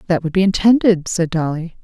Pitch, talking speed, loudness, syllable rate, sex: 180 Hz, 195 wpm, -16 LUFS, 5.6 syllables/s, female